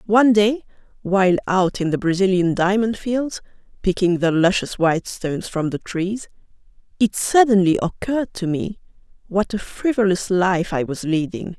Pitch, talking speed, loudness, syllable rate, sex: 195 Hz, 150 wpm, -20 LUFS, 4.9 syllables/s, female